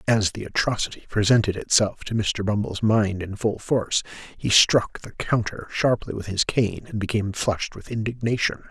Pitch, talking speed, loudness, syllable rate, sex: 105 Hz, 170 wpm, -23 LUFS, 5.1 syllables/s, male